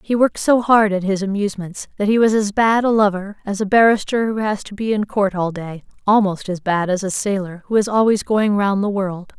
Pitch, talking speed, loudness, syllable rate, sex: 205 Hz, 235 wpm, -18 LUFS, 5.5 syllables/s, female